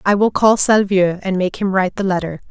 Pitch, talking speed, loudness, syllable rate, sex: 195 Hz, 240 wpm, -16 LUFS, 5.6 syllables/s, female